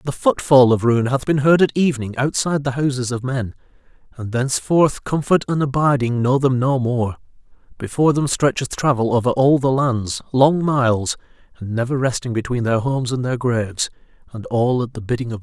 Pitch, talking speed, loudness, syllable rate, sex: 130 Hz, 185 wpm, -18 LUFS, 5.5 syllables/s, male